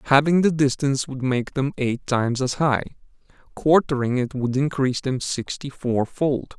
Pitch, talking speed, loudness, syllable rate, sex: 135 Hz, 165 wpm, -22 LUFS, 4.8 syllables/s, male